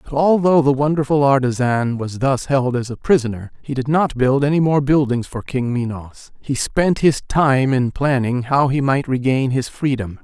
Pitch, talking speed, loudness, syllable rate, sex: 135 Hz, 195 wpm, -18 LUFS, 4.7 syllables/s, male